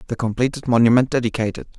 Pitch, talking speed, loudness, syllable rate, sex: 120 Hz, 135 wpm, -19 LUFS, 7.3 syllables/s, male